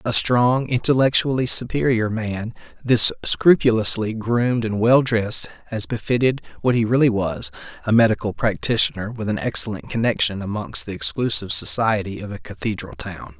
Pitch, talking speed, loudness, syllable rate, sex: 110 Hz, 140 wpm, -20 LUFS, 5.2 syllables/s, male